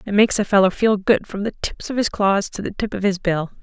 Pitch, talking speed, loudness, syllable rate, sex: 200 Hz, 300 wpm, -20 LUFS, 6.0 syllables/s, female